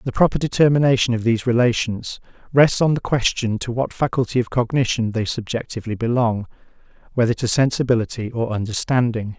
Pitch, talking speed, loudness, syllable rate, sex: 120 Hz, 145 wpm, -20 LUFS, 5.9 syllables/s, male